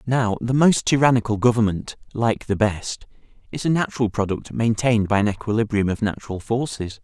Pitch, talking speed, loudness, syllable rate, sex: 110 Hz, 160 wpm, -21 LUFS, 5.6 syllables/s, male